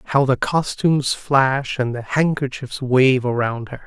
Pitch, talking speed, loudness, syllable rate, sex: 130 Hz, 155 wpm, -19 LUFS, 4.2 syllables/s, male